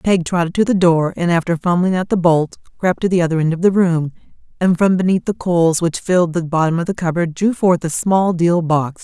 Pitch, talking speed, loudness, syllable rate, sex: 175 Hz, 245 wpm, -16 LUFS, 5.5 syllables/s, female